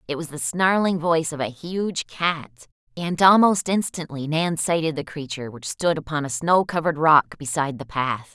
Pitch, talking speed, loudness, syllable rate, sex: 155 Hz, 185 wpm, -22 LUFS, 5.1 syllables/s, female